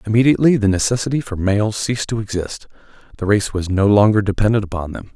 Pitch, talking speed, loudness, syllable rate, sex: 105 Hz, 175 wpm, -17 LUFS, 6.5 syllables/s, male